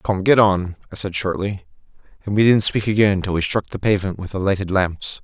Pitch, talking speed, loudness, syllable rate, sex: 100 Hz, 230 wpm, -19 LUFS, 5.6 syllables/s, male